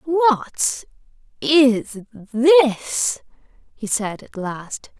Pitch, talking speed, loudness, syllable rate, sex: 250 Hz, 60 wpm, -19 LUFS, 1.9 syllables/s, female